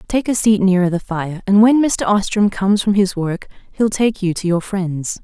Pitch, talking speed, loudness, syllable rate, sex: 195 Hz, 230 wpm, -16 LUFS, 4.8 syllables/s, female